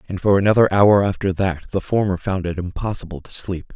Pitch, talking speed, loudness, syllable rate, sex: 95 Hz, 210 wpm, -19 LUFS, 5.8 syllables/s, male